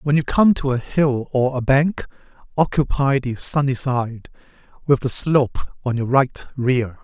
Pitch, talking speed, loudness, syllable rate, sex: 135 Hz, 170 wpm, -19 LUFS, 4.2 syllables/s, male